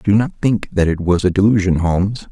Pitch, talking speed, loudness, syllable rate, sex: 100 Hz, 235 wpm, -16 LUFS, 5.4 syllables/s, male